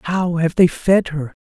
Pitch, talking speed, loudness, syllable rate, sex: 170 Hz, 210 wpm, -17 LUFS, 3.8 syllables/s, male